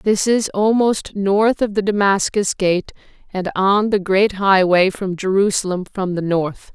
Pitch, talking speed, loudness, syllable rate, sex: 195 Hz, 160 wpm, -17 LUFS, 4.0 syllables/s, female